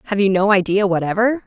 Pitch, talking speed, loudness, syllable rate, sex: 200 Hz, 205 wpm, -17 LUFS, 6.4 syllables/s, female